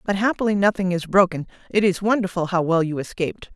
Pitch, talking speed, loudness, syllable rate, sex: 185 Hz, 205 wpm, -21 LUFS, 6.2 syllables/s, female